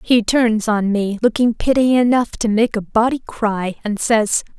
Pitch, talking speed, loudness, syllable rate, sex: 225 Hz, 185 wpm, -17 LUFS, 4.3 syllables/s, female